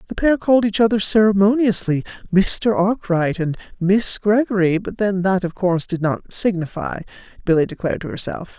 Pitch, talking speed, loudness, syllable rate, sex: 195 Hz, 155 wpm, -18 LUFS, 5.2 syllables/s, female